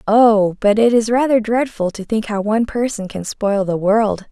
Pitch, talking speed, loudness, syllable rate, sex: 215 Hz, 210 wpm, -17 LUFS, 4.6 syllables/s, female